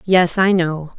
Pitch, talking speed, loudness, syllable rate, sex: 175 Hz, 180 wpm, -16 LUFS, 3.6 syllables/s, female